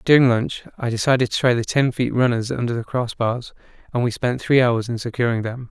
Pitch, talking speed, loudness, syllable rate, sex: 120 Hz, 210 wpm, -20 LUFS, 5.7 syllables/s, male